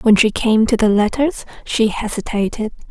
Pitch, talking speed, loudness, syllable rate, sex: 225 Hz, 165 wpm, -17 LUFS, 4.7 syllables/s, female